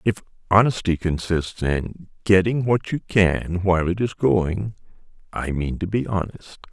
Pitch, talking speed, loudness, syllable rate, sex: 95 Hz, 150 wpm, -22 LUFS, 4.3 syllables/s, male